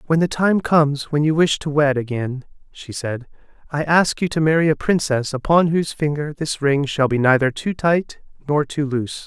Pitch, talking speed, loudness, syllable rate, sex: 150 Hz, 205 wpm, -19 LUFS, 5.0 syllables/s, male